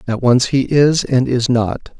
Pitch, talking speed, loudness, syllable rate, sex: 125 Hz, 210 wpm, -15 LUFS, 3.9 syllables/s, male